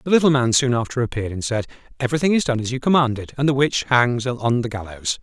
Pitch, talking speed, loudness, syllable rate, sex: 125 Hz, 240 wpm, -20 LUFS, 6.6 syllables/s, male